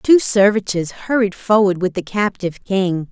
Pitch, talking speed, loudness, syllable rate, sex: 195 Hz, 155 wpm, -17 LUFS, 4.6 syllables/s, female